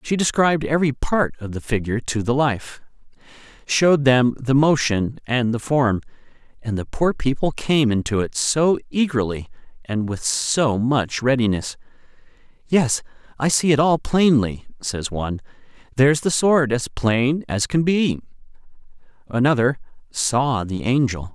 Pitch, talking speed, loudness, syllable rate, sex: 130 Hz, 145 wpm, -20 LUFS, 4.5 syllables/s, male